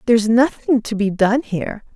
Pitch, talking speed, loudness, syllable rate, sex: 225 Hz, 185 wpm, -17 LUFS, 5.2 syllables/s, female